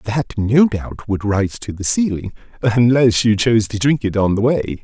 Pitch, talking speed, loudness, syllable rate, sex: 110 Hz, 210 wpm, -17 LUFS, 4.5 syllables/s, male